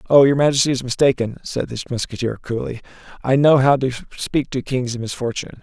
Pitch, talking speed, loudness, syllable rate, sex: 130 Hz, 190 wpm, -19 LUFS, 6.1 syllables/s, male